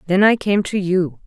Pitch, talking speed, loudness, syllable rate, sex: 185 Hz, 235 wpm, -17 LUFS, 4.7 syllables/s, female